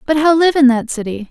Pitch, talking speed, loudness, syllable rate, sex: 270 Hz, 275 wpm, -13 LUFS, 6.0 syllables/s, female